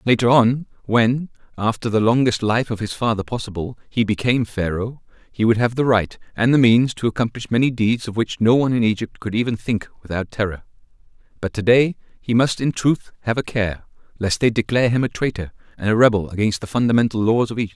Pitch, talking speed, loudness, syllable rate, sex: 115 Hz, 210 wpm, -19 LUFS, 6.0 syllables/s, male